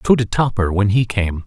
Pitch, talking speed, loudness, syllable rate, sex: 105 Hz, 245 wpm, -17 LUFS, 5.3 syllables/s, male